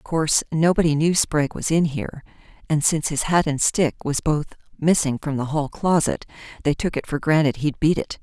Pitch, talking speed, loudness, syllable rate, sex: 155 Hz, 210 wpm, -21 LUFS, 5.5 syllables/s, female